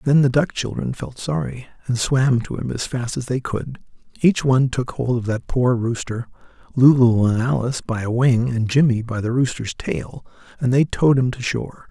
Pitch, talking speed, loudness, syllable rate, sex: 125 Hz, 205 wpm, -20 LUFS, 5.1 syllables/s, male